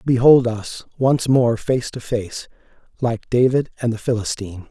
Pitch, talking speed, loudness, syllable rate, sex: 120 Hz, 155 wpm, -19 LUFS, 4.5 syllables/s, male